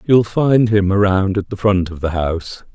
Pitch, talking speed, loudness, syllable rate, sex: 100 Hz, 220 wpm, -16 LUFS, 4.7 syllables/s, male